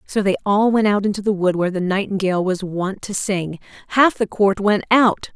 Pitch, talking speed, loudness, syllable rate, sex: 200 Hz, 225 wpm, -18 LUFS, 5.3 syllables/s, female